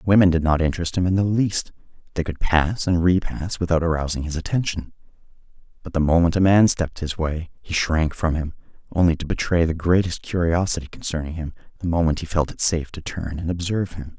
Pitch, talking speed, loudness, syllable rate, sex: 85 Hz, 205 wpm, -22 LUFS, 5.9 syllables/s, male